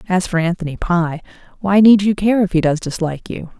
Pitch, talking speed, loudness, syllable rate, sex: 180 Hz, 215 wpm, -16 LUFS, 5.7 syllables/s, female